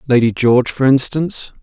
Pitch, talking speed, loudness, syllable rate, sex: 130 Hz, 150 wpm, -14 LUFS, 5.8 syllables/s, male